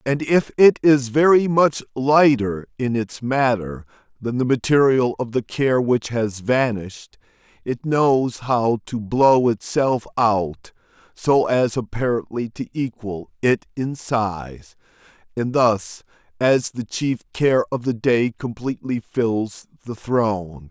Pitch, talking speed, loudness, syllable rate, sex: 120 Hz, 135 wpm, -20 LUFS, 3.6 syllables/s, male